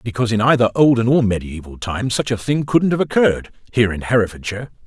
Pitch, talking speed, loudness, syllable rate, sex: 115 Hz, 185 wpm, -18 LUFS, 6.8 syllables/s, male